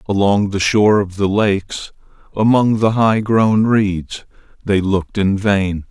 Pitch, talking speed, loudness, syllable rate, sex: 100 Hz, 150 wpm, -15 LUFS, 4.0 syllables/s, male